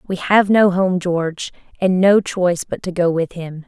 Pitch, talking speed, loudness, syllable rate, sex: 180 Hz, 210 wpm, -17 LUFS, 4.6 syllables/s, female